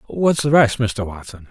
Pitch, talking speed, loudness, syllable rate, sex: 120 Hz, 200 wpm, -17 LUFS, 4.5 syllables/s, male